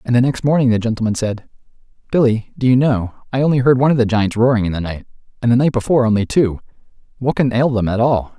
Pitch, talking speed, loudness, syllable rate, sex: 120 Hz, 245 wpm, -16 LUFS, 6.8 syllables/s, male